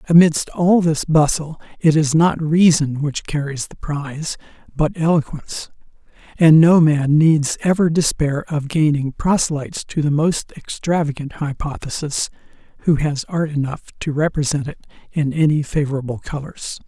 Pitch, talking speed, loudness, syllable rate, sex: 150 Hz, 140 wpm, -18 LUFS, 4.7 syllables/s, male